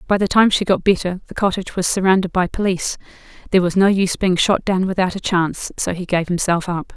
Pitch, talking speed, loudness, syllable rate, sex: 185 Hz, 235 wpm, -18 LUFS, 6.4 syllables/s, female